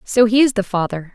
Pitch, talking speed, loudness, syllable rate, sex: 215 Hz, 260 wpm, -16 LUFS, 5.7 syllables/s, female